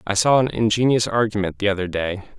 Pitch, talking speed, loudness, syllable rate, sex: 105 Hz, 200 wpm, -20 LUFS, 6.0 syllables/s, male